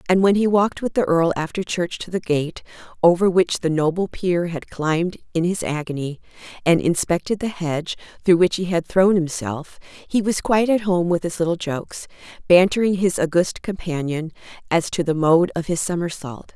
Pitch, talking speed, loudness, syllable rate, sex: 175 Hz, 190 wpm, -20 LUFS, 5.2 syllables/s, female